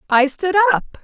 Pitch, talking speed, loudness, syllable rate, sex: 325 Hz, 175 wpm, -16 LUFS, 5.8 syllables/s, female